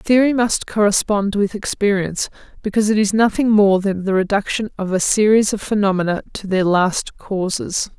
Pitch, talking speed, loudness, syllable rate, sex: 205 Hz, 165 wpm, -18 LUFS, 5.1 syllables/s, female